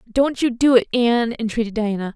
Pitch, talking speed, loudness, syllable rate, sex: 235 Hz, 195 wpm, -19 LUFS, 5.7 syllables/s, female